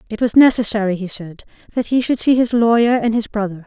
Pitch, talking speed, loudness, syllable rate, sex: 220 Hz, 230 wpm, -16 LUFS, 6.0 syllables/s, female